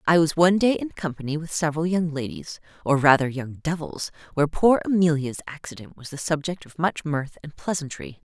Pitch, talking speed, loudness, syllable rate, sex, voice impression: 155 Hz, 190 wpm, -24 LUFS, 5.6 syllables/s, female, feminine, middle-aged, tensed, powerful, slightly hard, fluent, nasal, intellectual, calm, elegant, lively, slightly sharp